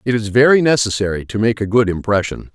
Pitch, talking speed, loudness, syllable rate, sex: 115 Hz, 210 wpm, -16 LUFS, 6.2 syllables/s, male